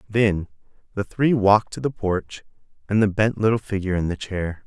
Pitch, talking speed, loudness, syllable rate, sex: 105 Hz, 195 wpm, -22 LUFS, 5.3 syllables/s, male